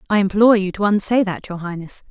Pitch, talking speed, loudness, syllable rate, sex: 200 Hz, 230 wpm, -18 LUFS, 6.4 syllables/s, female